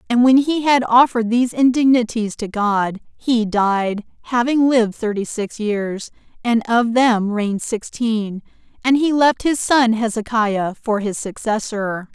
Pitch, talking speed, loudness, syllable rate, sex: 230 Hz, 150 wpm, -18 LUFS, 4.2 syllables/s, female